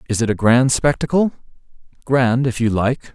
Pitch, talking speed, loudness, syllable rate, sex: 125 Hz, 170 wpm, -17 LUFS, 5.0 syllables/s, male